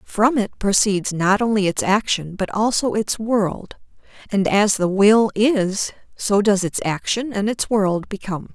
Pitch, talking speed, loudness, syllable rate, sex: 205 Hz, 170 wpm, -19 LUFS, 4.1 syllables/s, female